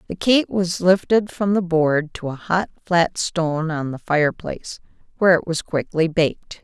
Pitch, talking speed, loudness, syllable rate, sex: 170 Hz, 180 wpm, -20 LUFS, 4.8 syllables/s, female